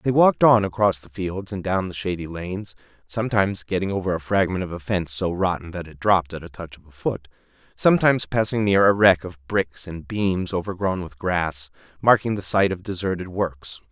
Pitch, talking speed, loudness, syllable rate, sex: 95 Hz, 205 wpm, -22 LUFS, 5.5 syllables/s, male